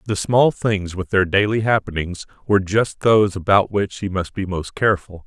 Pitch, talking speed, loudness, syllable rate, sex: 100 Hz, 195 wpm, -19 LUFS, 5.1 syllables/s, male